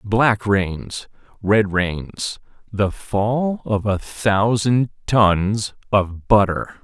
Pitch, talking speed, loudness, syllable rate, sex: 105 Hz, 90 wpm, -19 LUFS, 2.6 syllables/s, male